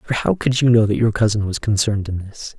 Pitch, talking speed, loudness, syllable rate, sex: 110 Hz, 280 wpm, -18 LUFS, 6.0 syllables/s, male